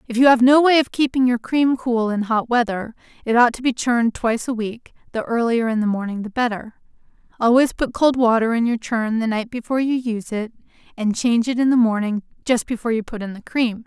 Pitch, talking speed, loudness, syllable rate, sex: 235 Hz, 235 wpm, -19 LUFS, 5.8 syllables/s, female